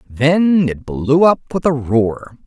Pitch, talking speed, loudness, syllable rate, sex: 140 Hz, 170 wpm, -15 LUFS, 3.3 syllables/s, male